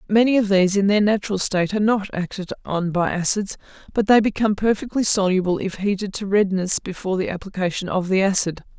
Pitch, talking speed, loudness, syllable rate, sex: 195 Hz, 190 wpm, -20 LUFS, 6.3 syllables/s, female